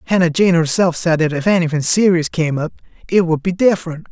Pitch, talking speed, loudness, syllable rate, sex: 165 Hz, 205 wpm, -16 LUFS, 5.7 syllables/s, male